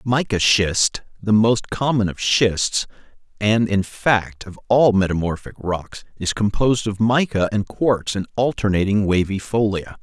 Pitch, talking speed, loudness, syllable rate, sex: 105 Hz, 145 wpm, -19 LUFS, 4.2 syllables/s, male